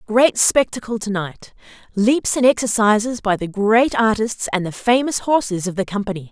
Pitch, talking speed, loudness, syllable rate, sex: 220 Hz, 160 wpm, -18 LUFS, 4.9 syllables/s, female